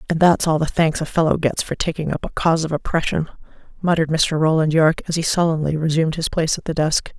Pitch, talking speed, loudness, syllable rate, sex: 160 Hz, 235 wpm, -19 LUFS, 6.7 syllables/s, female